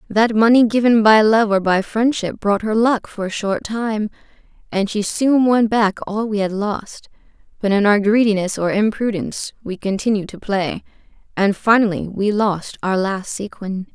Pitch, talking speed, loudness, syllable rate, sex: 210 Hz, 175 wpm, -18 LUFS, 4.5 syllables/s, female